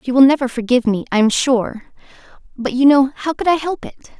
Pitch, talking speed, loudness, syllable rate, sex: 260 Hz, 230 wpm, -16 LUFS, 6.0 syllables/s, female